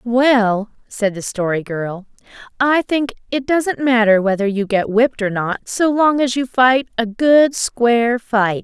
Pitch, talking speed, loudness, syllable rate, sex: 235 Hz, 175 wpm, -16 LUFS, 4.0 syllables/s, female